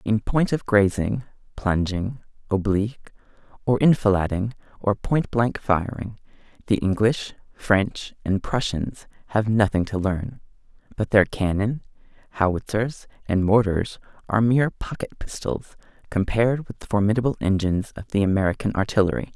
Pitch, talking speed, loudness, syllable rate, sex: 105 Hz, 125 wpm, -23 LUFS, 4.9 syllables/s, male